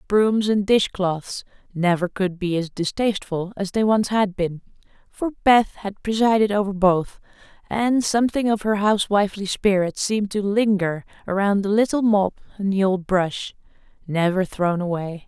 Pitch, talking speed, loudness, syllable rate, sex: 200 Hz, 155 wpm, -21 LUFS, 4.7 syllables/s, female